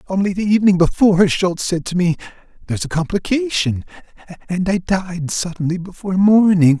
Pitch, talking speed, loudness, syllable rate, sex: 185 Hz, 150 wpm, -17 LUFS, 5.6 syllables/s, male